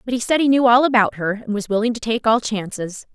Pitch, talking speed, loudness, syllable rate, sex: 225 Hz, 285 wpm, -18 LUFS, 6.1 syllables/s, female